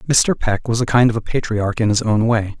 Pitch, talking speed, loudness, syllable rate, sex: 115 Hz, 275 wpm, -17 LUFS, 5.4 syllables/s, male